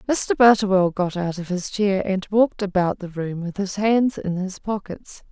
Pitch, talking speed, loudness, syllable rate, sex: 195 Hz, 205 wpm, -21 LUFS, 4.6 syllables/s, female